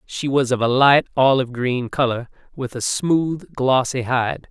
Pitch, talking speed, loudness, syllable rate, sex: 130 Hz, 175 wpm, -19 LUFS, 4.2 syllables/s, male